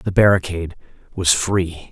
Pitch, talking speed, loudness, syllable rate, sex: 90 Hz, 125 wpm, -18 LUFS, 4.7 syllables/s, male